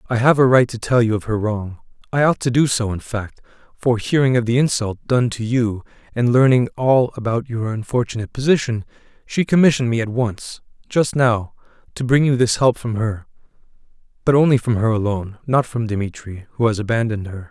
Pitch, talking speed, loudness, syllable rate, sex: 120 Hz, 190 wpm, -18 LUFS, 5.5 syllables/s, male